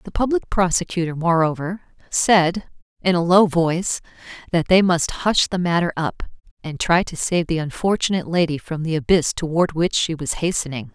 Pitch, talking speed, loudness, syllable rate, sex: 170 Hz, 170 wpm, -20 LUFS, 5.1 syllables/s, female